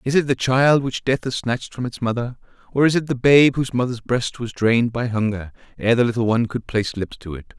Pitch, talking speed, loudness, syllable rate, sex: 120 Hz, 255 wpm, -20 LUFS, 5.9 syllables/s, male